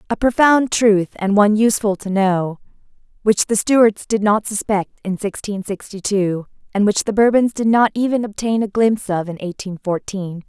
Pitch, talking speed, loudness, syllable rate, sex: 205 Hz, 185 wpm, -18 LUFS, 4.9 syllables/s, female